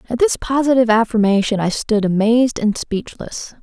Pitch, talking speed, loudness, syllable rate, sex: 230 Hz, 150 wpm, -16 LUFS, 5.3 syllables/s, female